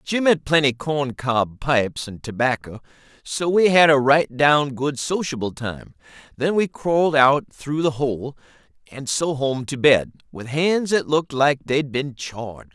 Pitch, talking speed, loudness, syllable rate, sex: 140 Hz, 175 wpm, -20 LUFS, 4.2 syllables/s, male